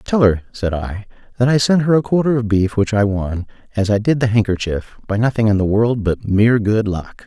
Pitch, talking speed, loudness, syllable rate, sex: 110 Hz, 240 wpm, -17 LUFS, 5.3 syllables/s, male